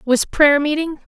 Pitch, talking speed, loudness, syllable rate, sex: 295 Hz, 155 wpm, -16 LUFS, 3.9 syllables/s, female